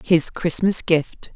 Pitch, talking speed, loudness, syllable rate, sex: 170 Hz, 135 wpm, -20 LUFS, 3.2 syllables/s, female